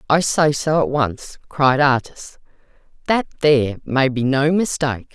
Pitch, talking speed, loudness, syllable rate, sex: 140 Hz, 150 wpm, -18 LUFS, 4.3 syllables/s, female